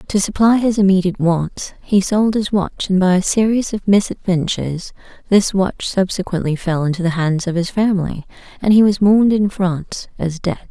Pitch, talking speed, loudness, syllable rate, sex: 190 Hz, 185 wpm, -16 LUFS, 5.2 syllables/s, female